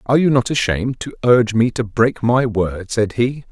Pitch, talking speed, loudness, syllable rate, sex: 120 Hz, 220 wpm, -17 LUFS, 5.2 syllables/s, male